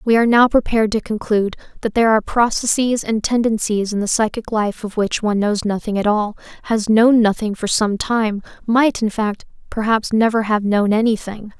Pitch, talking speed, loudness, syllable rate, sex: 220 Hz, 190 wpm, -17 LUFS, 5.4 syllables/s, female